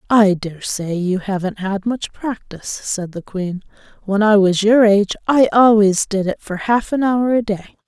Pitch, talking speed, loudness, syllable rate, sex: 205 Hz, 190 wpm, -17 LUFS, 4.6 syllables/s, female